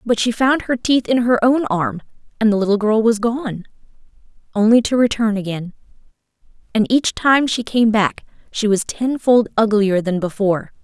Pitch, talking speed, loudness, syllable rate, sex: 225 Hz, 165 wpm, -17 LUFS, 4.9 syllables/s, female